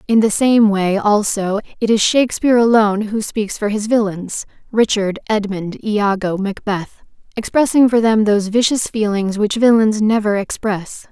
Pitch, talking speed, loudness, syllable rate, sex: 215 Hz, 150 wpm, -16 LUFS, 4.8 syllables/s, female